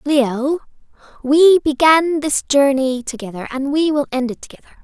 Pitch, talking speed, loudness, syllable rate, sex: 280 Hz, 150 wpm, -16 LUFS, 4.6 syllables/s, female